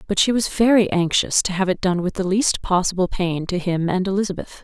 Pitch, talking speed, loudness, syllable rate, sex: 190 Hz, 235 wpm, -20 LUFS, 5.6 syllables/s, female